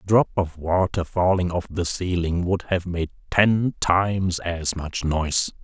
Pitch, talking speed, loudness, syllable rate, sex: 90 Hz, 170 wpm, -23 LUFS, 4.1 syllables/s, male